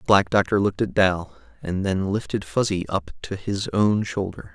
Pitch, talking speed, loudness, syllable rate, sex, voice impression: 95 Hz, 200 wpm, -23 LUFS, 4.8 syllables/s, male, masculine, adult-like, tensed, powerful, clear, slightly nasal, cool, intellectual, calm, friendly, reassuring, wild, lively, slightly strict